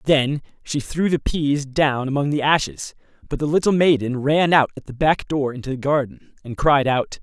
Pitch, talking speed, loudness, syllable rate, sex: 140 Hz, 210 wpm, -20 LUFS, 4.9 syllables/s, male